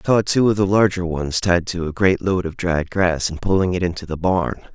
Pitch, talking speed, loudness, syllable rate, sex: 90 Hz, 265 wpm, -19 LUFS, 5.3 syllables/s, male